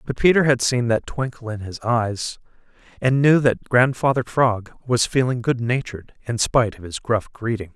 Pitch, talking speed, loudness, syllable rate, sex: 120 Hz, 180 wpm, -21 LUFS, 4.8 syllables/s, male